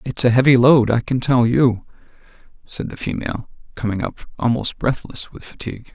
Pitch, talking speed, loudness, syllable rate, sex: 125 Hz, 170 wpm, -19 LUFS, 5.4 syllables/s, male